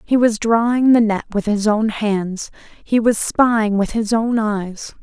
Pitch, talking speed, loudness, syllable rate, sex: 220 Hz, 190 wpm, -17 LUFS, 3.8 syllables/s, female